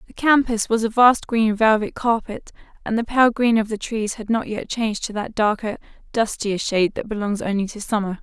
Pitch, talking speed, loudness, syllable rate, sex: 220 Hz, 210 wpm, -20 LUFS, 5.3 syllables/s, female